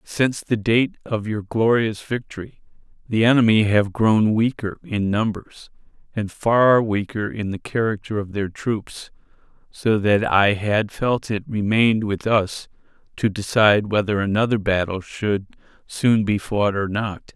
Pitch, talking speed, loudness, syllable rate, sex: 105 Hz, 150 wpm, -20 LUFS, 4.2 syllables/s, male